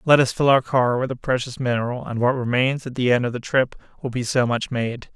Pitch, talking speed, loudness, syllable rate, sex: 125 Hz, 270 wpm, -21 LUFS, 5.6 syllables/s, male